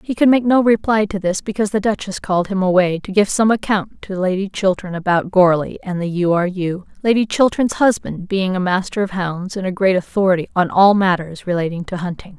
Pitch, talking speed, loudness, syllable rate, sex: 190 Hz, 220 wpm, -17 LUFS, 5.6 syllables/s, female